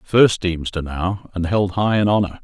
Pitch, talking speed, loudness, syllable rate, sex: 95 Hz, 195 wpm, -19 LUFS, 4.4 syllables/s, male